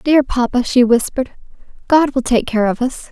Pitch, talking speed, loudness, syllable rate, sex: 250 Hz, 190 wpm, -15 LUFS, 5.0 syllables/s, female